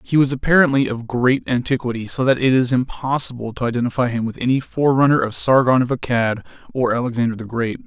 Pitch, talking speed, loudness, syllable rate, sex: 125 Hz, 190 wpm, -18 LUFS, 6.2 syllables/s, male